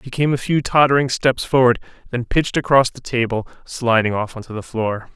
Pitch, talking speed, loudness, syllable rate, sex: 125 Hz, 200 wpm, -18 LUFS, 5.5 syllables/s, male